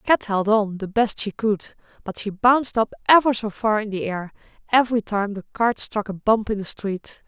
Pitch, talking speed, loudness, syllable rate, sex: 215 Hz, 225 wpm, -21 LUFS, 4.9 syllables/s, female